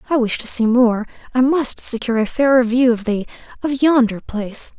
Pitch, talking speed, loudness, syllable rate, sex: 240 Hz, 175 wpm, -17 LUFS, 5.4 syllables/s, female